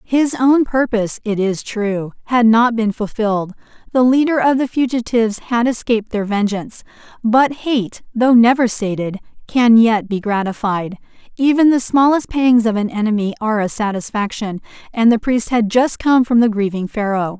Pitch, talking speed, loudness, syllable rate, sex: 225 Hz, 165 wpm, -16 LUFS, 4.9 syllables/s, female